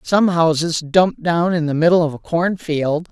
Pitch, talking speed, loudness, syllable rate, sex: 165 Hz, 195 wpm, -17 LUFS, 4.7 syllables/s, female